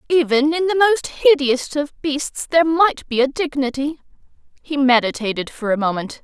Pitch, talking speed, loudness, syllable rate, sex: 285 Hz, 165 wpm, -18 LUFS, 4.8 syllables/s, female